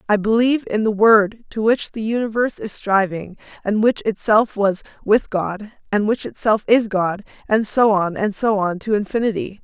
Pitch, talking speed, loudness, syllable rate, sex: 215 Hz, 185 wpm, -19 LUFS, 4.9 syllables/s, female